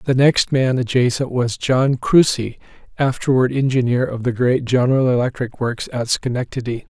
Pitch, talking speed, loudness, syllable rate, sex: 125 Hz, 145 wpm, -18 LUFS, 4.8 syllables/s, male